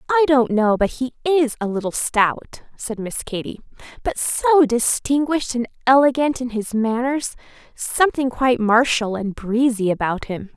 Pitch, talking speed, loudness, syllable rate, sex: 245 Hz, 150 wpm, -19 LUFS, 4.7 syllables/s, female